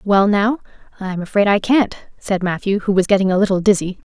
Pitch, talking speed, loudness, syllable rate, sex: 200 Hz, 205 wpm, -17 LUFS, 5.5 syllables/s, female